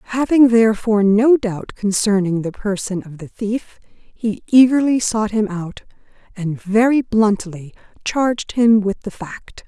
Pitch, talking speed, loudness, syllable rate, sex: 215 Hz, 145 wpm, -17 LUFS, 4.2 syllables/s, female